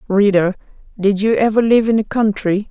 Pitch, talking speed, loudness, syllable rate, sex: 210 Hz, 180 wpm, -15 LUFS, 5.2 syllables/s, female